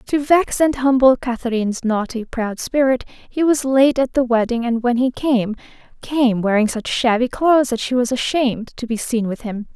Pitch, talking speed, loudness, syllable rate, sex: 245 Hz, 195 wpm, -18 LUFS, 4.9 syllables/s, female